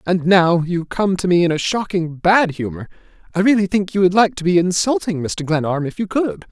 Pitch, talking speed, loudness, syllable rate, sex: 175 Hz, 220 wpm, -17 LUFS, 5.3 syllables/s, male